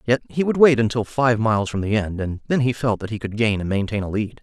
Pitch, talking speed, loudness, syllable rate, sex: 110 Hz, 300 wpm, -21 LUFS, 6.1 syllables/s, male